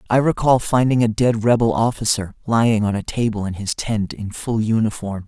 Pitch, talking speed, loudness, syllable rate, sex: 110 Hz, 195 wpm, -19 LUFS, 5.2 syllables/s, male